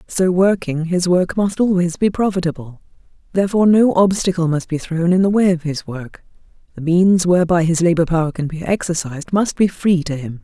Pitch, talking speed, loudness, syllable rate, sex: 175 Hz, 195 wpm, -17 LUFS, 5.5 syllables/s, female